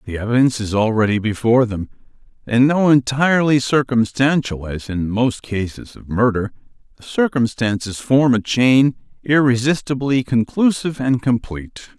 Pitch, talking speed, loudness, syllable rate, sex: 125 Hz, 115 wpm, -17 LUFS, 5.0 syllables/s, male